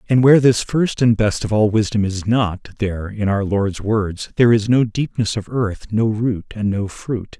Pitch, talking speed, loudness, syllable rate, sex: 110 Hz, 220 wpm, -18 LUFS, 4.6 syllables/s, male